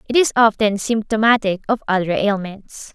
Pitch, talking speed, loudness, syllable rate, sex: 210 Hz, 145 wpm, -17 LUFS, 4.9 syllables/s, female